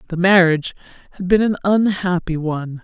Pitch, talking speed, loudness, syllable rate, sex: 180 Hz, 150 wpm, -17 LUFS, 5.7 syllables/s, female